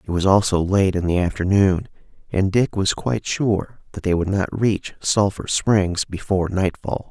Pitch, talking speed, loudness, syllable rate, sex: 95 Hz, 175 wpm, -20 LUFS, 4.6 syllables/s, male